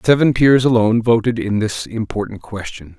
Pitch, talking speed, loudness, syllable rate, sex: 110 Hz, 160 wpm, -16 LUFS, 5.2 syllables/s, male